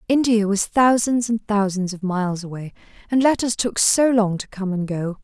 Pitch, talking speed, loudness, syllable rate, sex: 210 Hz, 195 wpm, -20 LUFS, 4.9 syllables/s, female